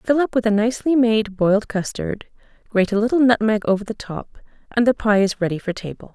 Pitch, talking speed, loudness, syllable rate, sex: 215 Hz, 215 wpm, -19 LUFS, 5.9 syllables/s, female